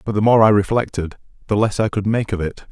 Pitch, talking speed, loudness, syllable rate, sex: 105 Hz, 265 wpm, -18 LUFS, 6.1 syllables/s, male